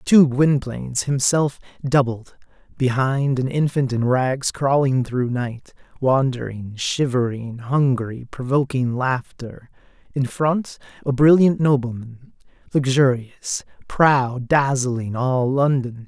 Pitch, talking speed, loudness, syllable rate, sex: 130 Hz, 95 wpm, -20 LUFS, 3.6 syllables/s, male